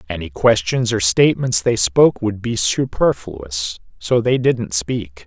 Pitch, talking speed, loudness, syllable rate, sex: 105 Hz, 150 wpm, -17 LUFS, 4.1 syllables/s, male